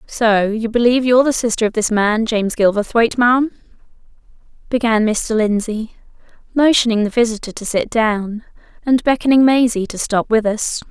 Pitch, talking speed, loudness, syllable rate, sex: 225 Hz, 155 wpm, -16 LUFS, 5.3 syllables/s, female